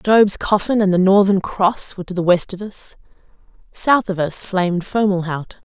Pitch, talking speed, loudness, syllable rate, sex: 190 Hz, 180 wpm, -17 LUFS, 4.7 syllables/s, female